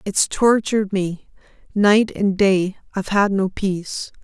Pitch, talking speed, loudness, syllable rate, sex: 200 Hz, 115 wpm, -19 LUFS, 4.2 syllables/s, female